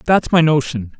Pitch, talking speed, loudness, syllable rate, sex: 150 Hz, 180 wpm, -15 LUFS, 5.1 syllables/s, male